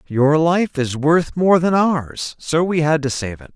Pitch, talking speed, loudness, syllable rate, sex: 155 Hz, 220 wpm, -17 LUFS, 3.9 syllables/s, male